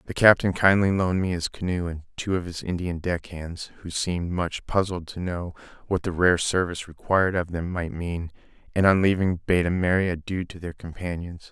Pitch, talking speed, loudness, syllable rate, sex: 90 Hz, 205 wpm, -25 LUFS, 5.3 syllables/s, male